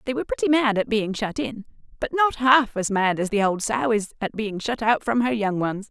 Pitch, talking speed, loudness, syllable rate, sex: 225 Hz, 265 wpm, -22 LUFS, 5.3 syllables/s, female